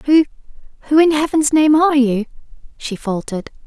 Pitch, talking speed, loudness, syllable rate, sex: 280 Hz, 130 wpm, -15 LUFS, 5.6 syllables/s, female